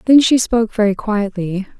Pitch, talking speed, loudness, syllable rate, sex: 215 Hz, 165 wpm, -16 LUFS, 5.2 syllables/s, female